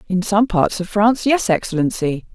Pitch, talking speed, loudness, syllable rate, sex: 200 Hz, 155 wpm, -18 LUFS, 5.2 syllables/s, female